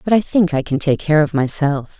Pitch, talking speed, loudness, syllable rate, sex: 155 Hz, 270 wpm, -17 LUFS, 5.3 syllables/s, female